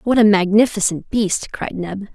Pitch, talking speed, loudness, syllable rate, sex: 205 Hz, 170 wpm, -17 LUFS, 4.5 syllables/s, female